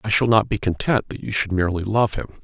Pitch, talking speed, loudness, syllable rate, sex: 100 Hz, 270 wpm, -21 LUFS, 6.4 syllables/s, male